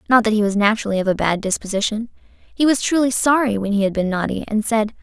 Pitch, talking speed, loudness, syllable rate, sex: 220 Hz, 240 wpm, -19 LUFS, 6.3 syllables/s, female